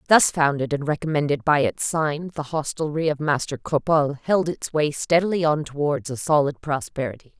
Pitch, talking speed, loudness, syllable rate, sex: 150 Hz, 170 wpm, -22 LUFS, 5.2 syllables/s, female